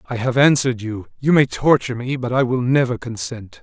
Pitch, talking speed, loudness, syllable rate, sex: 125 Hz, 215 wpm, -18 LUFS, 5.6 syllables/s, male